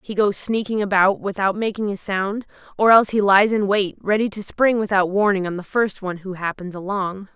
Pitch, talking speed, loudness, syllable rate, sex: 200 Hz, 210 wpm, -20 LUFS, 5.4 syllables/s, female